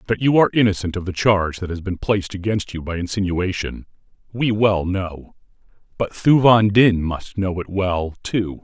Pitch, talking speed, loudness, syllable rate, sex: 95 Hz, 180 wpm, -19 LUFS, 5.0 syllables/s, male